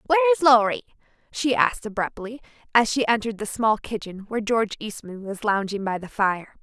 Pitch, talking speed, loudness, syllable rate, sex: 225 Hz, 180 wpm, -23 LUFS, 6.1 syllables/s, female